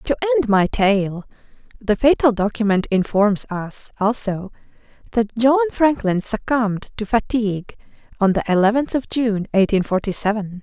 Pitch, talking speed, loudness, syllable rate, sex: 215 Hz, 135 wpm, -19 LUFS, 4.7 syllables/s, female